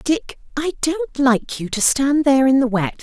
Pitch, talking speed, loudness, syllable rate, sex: 275 Hz, 220 wpm, -18 LUFS, 4.4 syllables/s, female